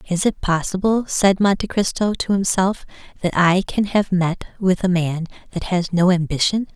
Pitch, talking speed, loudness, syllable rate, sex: 185 Hz, 180 wpm, -19 LUFS, 4.8 syllables/s, female